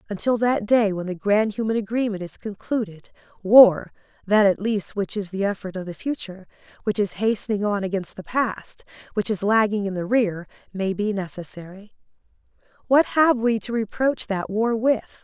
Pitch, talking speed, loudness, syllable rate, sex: 210 Hz, 175 wpm, -22 LUFS, 5.0 syllables/s, female